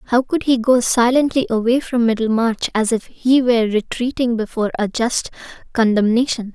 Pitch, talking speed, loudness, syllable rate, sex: 235 Hz, 155 wpm, -17 LUFS, 5.1 syllables/s, female